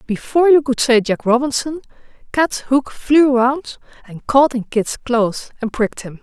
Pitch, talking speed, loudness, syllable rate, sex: 255 Hz, 175 wpm, -16 LUFS, 4.8 syllables/s, female